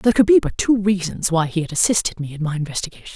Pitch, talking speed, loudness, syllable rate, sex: 180 Hz, 265 wpm, -19 LUFS, 7.2 syllables/s, female